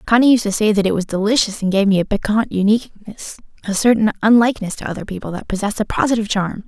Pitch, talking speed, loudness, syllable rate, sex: 210 Hz, 215 wpm, -17 LUFS, 7.0 syllables/s, female